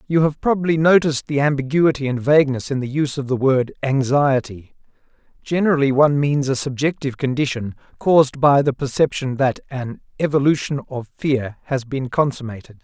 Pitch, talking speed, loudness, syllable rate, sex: 140 Hz, 155 wpm, -19 LUFS, 5.6 syllables/s, male